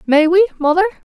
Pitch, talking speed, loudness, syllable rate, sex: 345 Hz, 160 wpm, -14 LUFS, 5.9 syllables/s, female